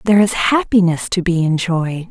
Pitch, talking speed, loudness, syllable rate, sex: 180 Hz, 170 wpm, -16 LUFS, 5.0 syllables/s, female